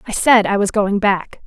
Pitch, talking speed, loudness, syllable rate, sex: 205 Hz, 245 wpm, -15 LUFS, 4.6 syllables/s, female